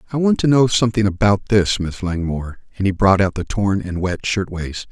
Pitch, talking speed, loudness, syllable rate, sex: 100 Hz, 220 wpm, -18 LUFS, 5.5 syllables/s, male